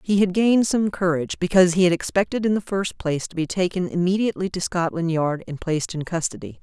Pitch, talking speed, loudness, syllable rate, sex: 180 Hz, 215 wpm, -22 LUFS, 6.3 syllables/s, female